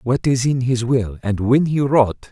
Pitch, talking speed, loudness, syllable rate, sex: 125 Hz, 235 wpm, -18 LUFS, 4.5 syllables/s, male